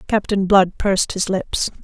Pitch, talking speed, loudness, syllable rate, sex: 195 Hz, 165 wpm, -18 LUFS, 4.4 syllables/s, female